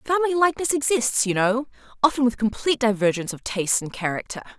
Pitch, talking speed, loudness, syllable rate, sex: 245 Hz, 155 wpm, -22 LUFS, 7.0 syllables/s, female